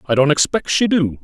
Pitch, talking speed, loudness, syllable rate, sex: 155 Hz, 245 wpm, -16 LUFS, 5.6 syllables/s, male